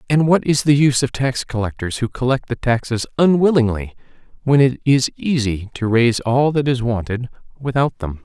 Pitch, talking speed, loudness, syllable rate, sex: 125 Hz, 180 wpm, -18 LUFS, 5.3 syllables/s, male